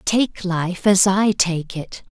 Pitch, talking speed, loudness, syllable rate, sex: 190 Hz, 165 wpm, -18 LUFS, 2.9 syllables/s, female